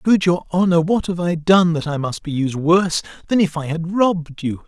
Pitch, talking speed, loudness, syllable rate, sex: 170 Hz, 245 wpm, -18 LUFS, 5.2 syllables/s, male